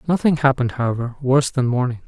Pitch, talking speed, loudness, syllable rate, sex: 130 Hz, 175 wpm, -19 LUFS, 7.1 syllables/s, male